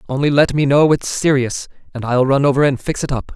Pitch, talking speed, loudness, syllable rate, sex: 140 Hz, 250 wpm, -16 LUFS, 5.8 syllables/s, male